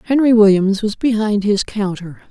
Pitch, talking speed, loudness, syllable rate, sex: 210 Hz, 155 wpm, -15 LUFS, 4.9 syllables/s, female